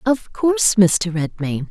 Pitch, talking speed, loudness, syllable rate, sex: 205 Hz, 140 wpm, -18 LUFS, 3.8 syllables/s, female